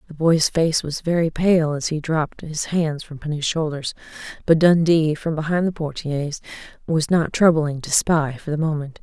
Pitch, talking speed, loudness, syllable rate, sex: 155 Hz, 185 wpm, -20 LUFS, 4.9 syllables/s, female